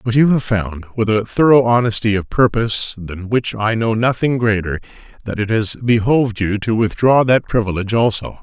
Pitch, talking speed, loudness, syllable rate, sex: 110 Hz, 170 wpm, -16 LUFS, 5.2 syllables/s, male